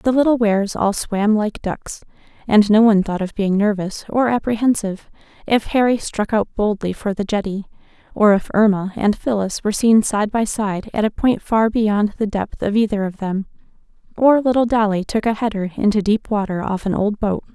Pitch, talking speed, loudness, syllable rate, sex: 210 Hz, 200 wpm, -18 LUFS, 5.1 syllables/s, female